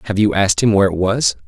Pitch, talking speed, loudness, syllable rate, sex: 95 Hz, 285 wpm, -15 LUFS, 7.4 syllables/s, male